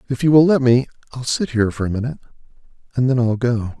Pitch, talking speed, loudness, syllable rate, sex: 125 Hz, 235 wpm, -18 LUFS, 7.1 syllables/s, male